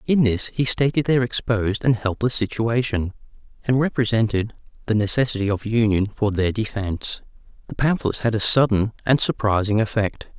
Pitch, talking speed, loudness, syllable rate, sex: 115 Hz, 150 wpm, -21 LUFS, 5.4 syllables/s, male